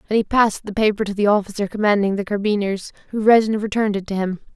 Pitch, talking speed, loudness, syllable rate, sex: 205 Hz, 235 wpm, -19 LUFS, 6.9 syllables/s, female